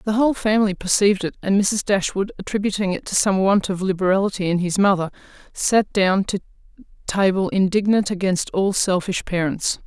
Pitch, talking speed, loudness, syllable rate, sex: 195 Hz, 165 wpm, -20 LUFS, 5.5 syllables/s, female